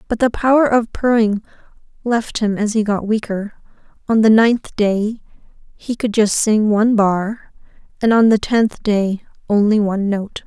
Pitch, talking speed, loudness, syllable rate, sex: 215 Hz, 165 wpm, -16 LUFS, 4.5 syllables/s, female